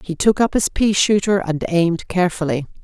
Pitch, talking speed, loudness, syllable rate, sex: 180 Hz, 190 wpm, -18 LUFS, 5.5 syllables/s, female